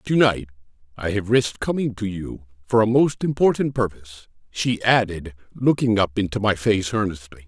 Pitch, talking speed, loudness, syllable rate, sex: 105 Hz, 170 wpm, -21 LUFS, 5.1 syllables/s, male